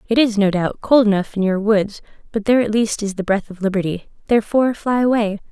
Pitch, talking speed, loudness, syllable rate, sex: 210 Hz, 230 wpm, -18 LUFS, 6.1 syllables/s, female